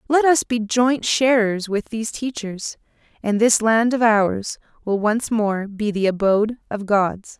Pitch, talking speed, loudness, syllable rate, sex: 220 Hz, 170 wpm, -20 LUFS, 4.1 syllables/s, female